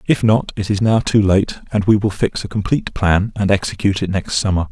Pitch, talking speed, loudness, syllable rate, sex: 100 Hz, 240 wpm, -17 LUFS, 5.8 syllables/s, male